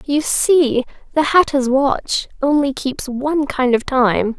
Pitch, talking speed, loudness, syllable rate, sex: 270 Hz, 150 wpm, -17 LUFS, 3.9 syllables/s, female